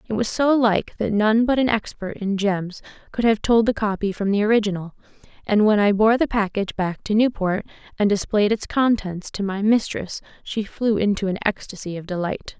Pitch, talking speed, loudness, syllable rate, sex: 210 Hz, 200 wpm, -21 LUFS, 5.2 syllables/s, female